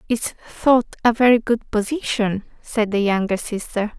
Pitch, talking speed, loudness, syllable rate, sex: 225 Hz, 150 wpm, -20 LUFS, 4.5 syllables/s, female